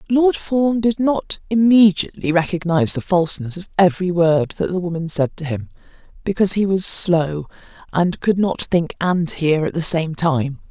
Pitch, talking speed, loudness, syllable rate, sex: 180 Hz, 175 wpm, -18 LUFS, 4.9 syllables/s, female